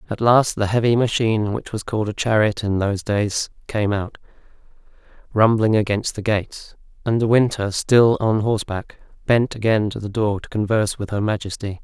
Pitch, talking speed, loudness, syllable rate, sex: 105 Hz, 180 wpm, -20 LUFS, 5.3 syllables/s, male